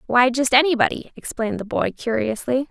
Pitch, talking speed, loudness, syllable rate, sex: 250 Hz, 155 wpm, -20 LUFS, 5.6 syllables/s, female